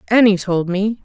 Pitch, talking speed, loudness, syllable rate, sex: 200 Hz, 175 wpm, -16 LUFS, 4.7 syllables/s, female